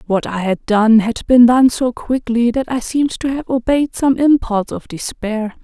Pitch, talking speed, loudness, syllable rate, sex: 240 Hz, 200 wpm, -15 LUFS, 4.6 syllables/s, female